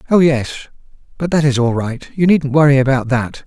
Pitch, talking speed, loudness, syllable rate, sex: 140 Hz, 210 wpm, -15 LUFS, 5.6 syllables/s, male